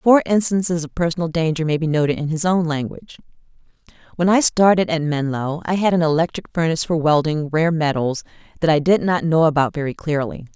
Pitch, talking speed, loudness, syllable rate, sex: 160 Hz, 195 wpm, -19 LUFS, 5.9 syllables/s, female